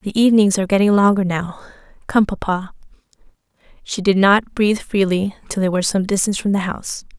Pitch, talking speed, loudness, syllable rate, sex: 195 Hz, 175 wpm, -17 LUFS, 6.2 syllables/s, female